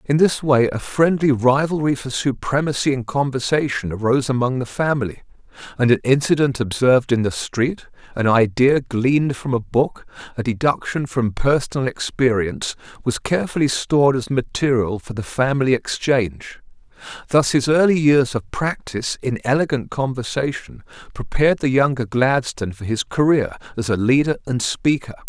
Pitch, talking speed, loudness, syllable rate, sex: 130 Hz, 145 wpm, -19 LUFS, 5.2 syllables/s, male